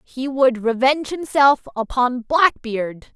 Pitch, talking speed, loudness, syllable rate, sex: 260 Hz, 115 wpm, -19 LUFS, 3.8 syllables/s, female